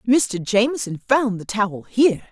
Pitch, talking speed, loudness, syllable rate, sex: 220 Hz, 155 wpm, -20 LUFS, 5.0 syllables/s, female